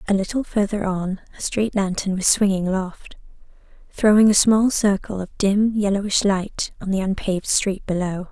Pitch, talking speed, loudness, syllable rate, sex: 200 Hz, 165 wpm, -20 LUFS, 4.9 syllables/s, female